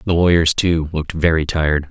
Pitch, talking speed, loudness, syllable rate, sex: 80 Hz, 190 wpm, -17 LUFS, 5.8 syllables/s, male